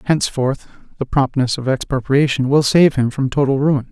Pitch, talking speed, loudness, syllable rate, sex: 135 Hz, 170 wpm, -17 LUFS, 5.2 syllables/s, male